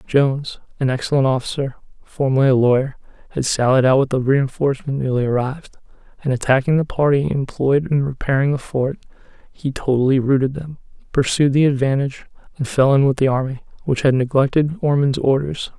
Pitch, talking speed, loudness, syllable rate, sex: 135 Hz, 160 wpm, -18 LUFS, 5.9 syllables/s, male